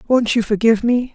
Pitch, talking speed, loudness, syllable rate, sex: 230 Hz, 210 wpm, -16 LUFS, 6.1 syllables/s, male